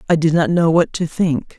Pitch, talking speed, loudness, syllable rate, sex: 165 Hz, 265 wpm, -16 LUFS, 5.0 syllables/s, female